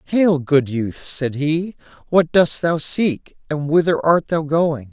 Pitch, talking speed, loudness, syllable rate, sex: 155 Hz, 170 wpm, -18 LUFS, 3.5 syllables/s, male